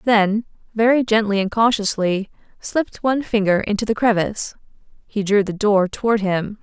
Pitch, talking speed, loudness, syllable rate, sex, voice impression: 210 Hz, 155 wpm, -19 LUFS, 5.3 syllables/s, female, feminine, adult-like, slightly cute, slightly sincere, friendly, slightly elegant